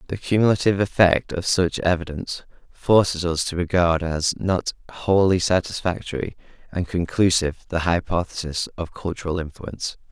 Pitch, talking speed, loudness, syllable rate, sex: 90 Hz, 125 wpm, -22 LUFS, 5.2 syllables/s, male